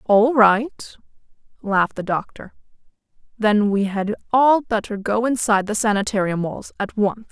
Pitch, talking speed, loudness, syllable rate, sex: 215 Hz, 140 wpm, -19 LUFS, 4.5 syllables/s, female